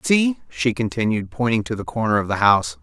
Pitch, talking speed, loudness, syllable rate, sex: 115 Hz, 215 wpm, -20 LUFS, 5.6 syllables/s, male